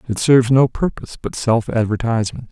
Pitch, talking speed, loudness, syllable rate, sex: 120 Hz, 165 wpm, -17 LUFS, 6.0 syllables/s, male